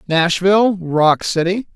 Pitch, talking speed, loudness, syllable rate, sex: 180 Hz, 100 wpm, -15 LUFS, 3.9 syllables/s, male